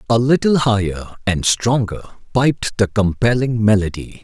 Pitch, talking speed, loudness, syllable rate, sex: 110 Hz, 130 wpm, -17 LUFS, 4.2 syllables/s, male